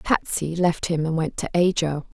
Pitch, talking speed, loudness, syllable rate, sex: 165 Hz, 190 wpm, -23 LUFS, 4.6 syllables/s, female